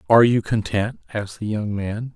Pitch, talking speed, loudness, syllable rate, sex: 110 Hz, 195 wpm, -22 LUFS, 5.5 syllables/s, male